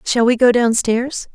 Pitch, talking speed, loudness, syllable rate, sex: 240 Hz, 225 wpm, -15 LUFS, 4.1 syllables/s, female